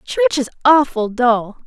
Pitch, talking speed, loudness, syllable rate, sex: 260 Hz, 145 wpm, -16 LUFS, 6.2 syllables/s, female